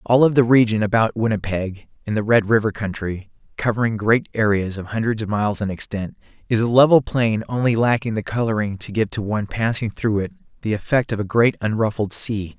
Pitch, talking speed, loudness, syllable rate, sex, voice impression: 110 Hz, 200 wpm, -20 LUFS, 5.7 syllables/s, male, very masculine, slightly young, slightly adult-like, thick, tensed, powerful, bright, hard, clear, fluent, slightly raspy, cool, very intellectual, refreshing, very sincere, very calm, slightly mature, friendly, very reassuring, slightly unique, wild, slightly sweet, slightly lively, very kind, slightly modest